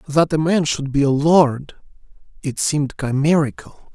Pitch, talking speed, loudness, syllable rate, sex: 150 Hz, 135 wpm, -18 LUFS, 4.6 syllables/s, male